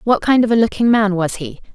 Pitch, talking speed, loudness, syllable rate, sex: 215 Hz, 275 wpm, -15 LUFS, 5.9 syllables/s, female